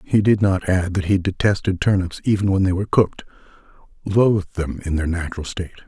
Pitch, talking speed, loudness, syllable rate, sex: 95 Hz, 185 wpm, -20 LUFS, 6.1 syllables/s, male